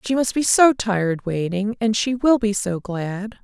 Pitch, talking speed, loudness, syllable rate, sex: 215 Hz, 210 wpm, -20 LUFS, 4.3 syllables/s, female